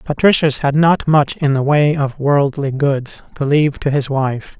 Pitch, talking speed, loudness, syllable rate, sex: 145 Hz, 195 wpm, -15 LUFS, 4.3 syllables/s, male